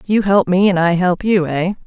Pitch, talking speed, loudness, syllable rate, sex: 185 Hz, 260 wpm, -15 LUFS, 4.8 syllables/s, female